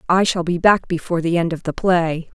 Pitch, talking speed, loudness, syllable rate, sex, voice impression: 170 Hz, 250 wpm, -18 LUFS, 5.6 syllables/s, female, very feminine, slightly young, slightly adult-like, slightly tensed, slightly weak, slightly dark, slightly hard, slightly clear, fluent, slightly cool, intellectual, refreshing, sincere, very calm, friendly, reassuring, slightly unique, slightly elegant, sweet, slightly lively, strict, slightly sharp